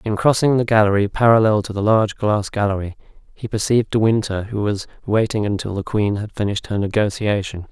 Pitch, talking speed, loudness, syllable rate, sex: 105 Hz, 185 wpm, -19 LUFS, 6.0 syllables/s, male